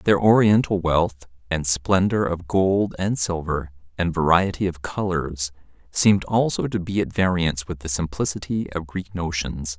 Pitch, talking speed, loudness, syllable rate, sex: 85 Hz, 155 wpm, -22 LUFS, 4.5 syllables/s, male